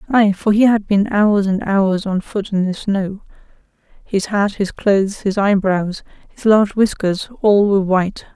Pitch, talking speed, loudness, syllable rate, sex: 200 Hz, 180 wpm, -16 LUFS, 4.5 syllables/s, female